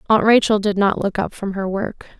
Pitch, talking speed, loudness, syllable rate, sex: 205 Hz, 245 wpm, -18 LUFS, 5.3 syllables/s, female